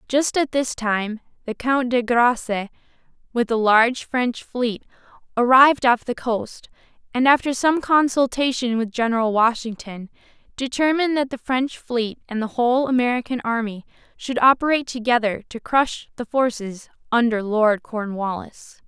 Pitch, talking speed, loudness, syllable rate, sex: 240 Hz, 140 wpm, -20 LUFS, 4.8 syllables/s, female